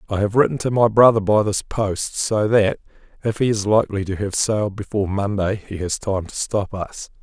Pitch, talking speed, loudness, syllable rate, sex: 105 Hz, 215 wpm, -20 LUFS, 5.3 syllables/s, male